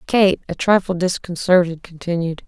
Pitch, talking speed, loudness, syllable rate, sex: 175 Hz, 120 wpm, -18 LUFS, 4.9 syllables/s, female